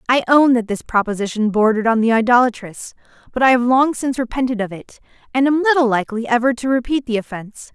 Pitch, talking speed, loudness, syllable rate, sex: 240 Hz, 200 wpm, -17 LUFS, 6.5 syllables/s, female